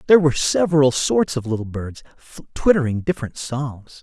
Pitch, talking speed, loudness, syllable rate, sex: 135 Hz, 150 wpm, -20 LUFS, 5.7 syllables/s, male